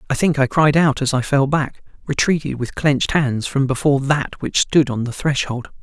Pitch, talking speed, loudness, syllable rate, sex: 140 Hz, 205 wpm, -18 LUFS, 5.2 syllables/s, male